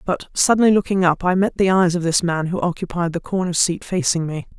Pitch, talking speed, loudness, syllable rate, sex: 180 Hz, 235 wpm, -19 LUFS, 5.7 syllables/s, female